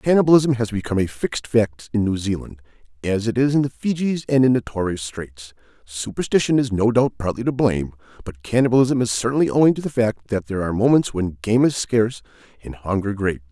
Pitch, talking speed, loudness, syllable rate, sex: 115 Hz, 200 wpm, -20 LUFS, 5.9 syllables/s, male